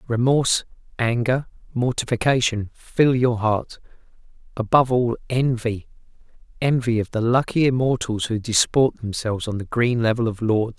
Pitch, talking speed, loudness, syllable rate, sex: 120 Hz, 120 wpm, -21 LUFS, 4.9 syllables/s, male